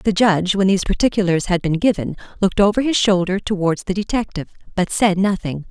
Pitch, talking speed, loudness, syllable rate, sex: 190 Hz, 190 wpm, -18 LUFS, 6.2 syllables/s, female